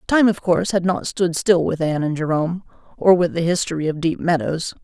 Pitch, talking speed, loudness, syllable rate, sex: 170 Hz, 225 wpm, -19 LUFS, 5.8 syllables/s, female